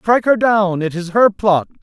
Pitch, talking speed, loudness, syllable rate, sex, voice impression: 200 Hz, 230 wpm, -15 LUFS, 4.8 syllables/s, male, masculine, middle-aged, tensed, slightly powerful, hard, slightly muffled, intellectual, calm, slightly mature, slightly wild, slightly strict